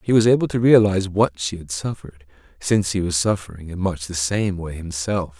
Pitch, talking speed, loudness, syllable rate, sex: 90 Hz, 210 wpm, -20 LUFS, 5.7 syllables/s, male